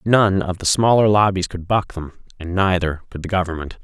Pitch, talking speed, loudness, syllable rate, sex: 95 Hz, 205 wpm, -18 LUFS, 5.2 syllables/s, male